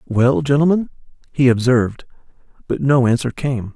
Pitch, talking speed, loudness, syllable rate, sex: 130 Hz, 130 wpm, -17 LUFS, 5.0 syllables/s, male